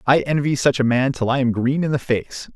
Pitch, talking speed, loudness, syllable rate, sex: 135 Hz, 280 wpm, -19 LUFS, 5.4 syllables/s, male